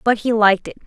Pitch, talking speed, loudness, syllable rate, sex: 220 Hz, 275 wpm, -16 LUFS, 7.5 syllables/s, female